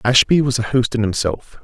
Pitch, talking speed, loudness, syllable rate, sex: 115 Hz, 220 wpm, -17 LUFS, 5.3 syllables/s, male